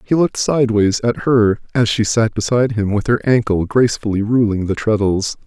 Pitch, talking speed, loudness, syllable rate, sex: 110 Hz, 185 wpm, -16 LUFS, 5.5 syllables/s, male